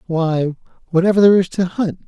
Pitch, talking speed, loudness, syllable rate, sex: 175 Hz, 175 wpm, -16 LUFS, 6.0 syllables/s, male